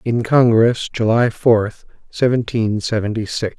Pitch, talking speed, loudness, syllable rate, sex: 115 Hz, 115 wpm, -17 LUFS, 4.0 syllables/s, male